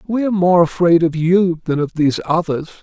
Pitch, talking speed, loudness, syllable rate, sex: 170 Hz, 210 wpm, -16 LUFS, 5.5 syllables/s, male